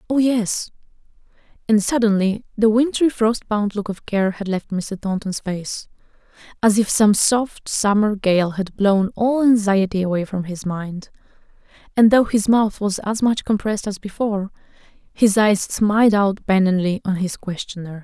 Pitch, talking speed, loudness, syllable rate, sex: 205 Hz, 160 wpm, -19 LUFS, 4.4 syllables/s, female